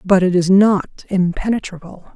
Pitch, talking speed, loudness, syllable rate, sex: 190 Hz, 140 wpm, -16 LUFS, 4.5 syllables/s, female